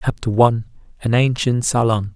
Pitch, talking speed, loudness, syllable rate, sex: 115 Hz, 110 wpm, -18 LUFS, 5.4 syllables/s, male